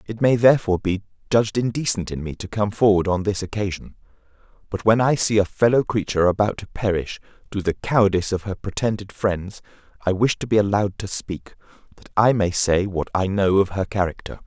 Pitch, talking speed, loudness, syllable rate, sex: 100 Hz, 200 wpm, -21 LUFS, 5.9 syllables/s, male